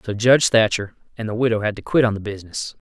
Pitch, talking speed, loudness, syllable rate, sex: 110 Hz, 250 wpm, -19 LUFS, 6.9 syllables/s, male